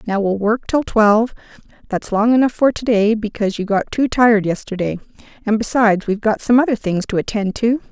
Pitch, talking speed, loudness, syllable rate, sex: 220 Hz, 205 wpm, -17 LUFS, 5.9 syllables/s, female